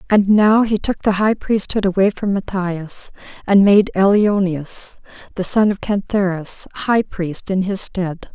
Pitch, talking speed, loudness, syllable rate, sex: 195 Hz, 160 wpm, -17 LUFS, 3.8 syllables/s, female